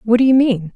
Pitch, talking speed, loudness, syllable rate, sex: 230 Hz, 315 wpm, -14 LUFS, 6.2 syllables/s, female